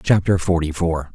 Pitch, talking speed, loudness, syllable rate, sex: 85 Hz, 155 wpm, -19 LUFS, 4.9 syllables/s, male